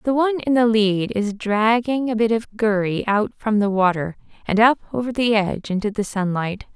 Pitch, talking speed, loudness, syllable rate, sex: 215 Hz, 205 wpm, -20 LUFS, 5.0 syllables/s, female